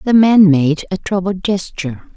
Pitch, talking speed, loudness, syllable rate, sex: 180 Hz, 165 wpm, -14 LUFS, 4.7 syllables/s, female